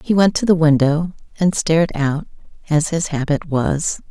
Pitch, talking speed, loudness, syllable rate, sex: 160 Hz, 175 wpm, -18 LUFS, 4.6 syllables/s, female